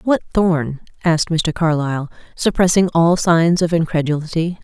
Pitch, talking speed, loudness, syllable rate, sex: 165 Hz, 130 wpm, -17 LUFS, 4.8 syllables/s, female